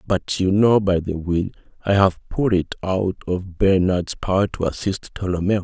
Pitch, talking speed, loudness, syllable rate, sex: 95 Hz, 180 wpm, -21 LUFS, 4.6 syllables/s, male